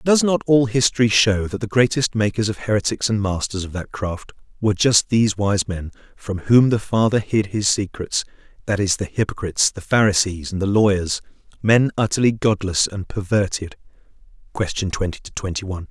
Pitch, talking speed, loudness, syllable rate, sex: 105 Hz, 175 wpm, -20 LUFS, 4.9 syllables/s, male